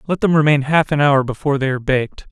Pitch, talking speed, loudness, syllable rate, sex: 145 Hz, 260 wpm, -16 LUFS, 7.1 syllables/s, male